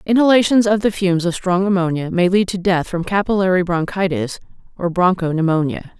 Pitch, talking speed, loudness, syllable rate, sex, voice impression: 185 Hz, 170 wpm, -17 LUFS, 5.7 syllables/s, female, very feminine, adult-like, slightly intellectual, slightly sweet